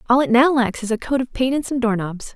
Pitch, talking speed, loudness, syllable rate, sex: 245 Hz, 305 wpm, -19 LUFS, 6.1 syllables/s, female